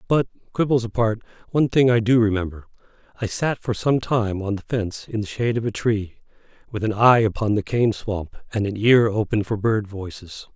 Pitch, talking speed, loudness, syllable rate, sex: 110 Hz, 205 wpm, -21 LUFS, 5.4 syllables/s, male